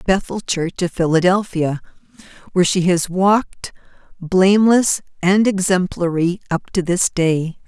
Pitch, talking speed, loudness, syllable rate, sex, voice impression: 185 Hz, 115 wpm, -17 LUFS, 4.3 syllables/s, female, feminine, very adult-like, slightly halting, slightly intellectual, slightly calm, elegant